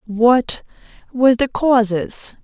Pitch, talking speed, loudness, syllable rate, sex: 240 Hz, 100 wpm, -16 LUFS, 3.4 syllables/s, female